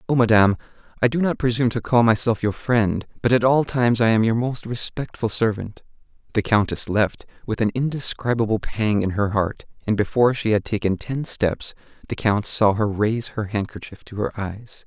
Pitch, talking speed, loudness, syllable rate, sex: 110 Hz, 195 wpm, -21 LUFS, 5.3 syllables/s, male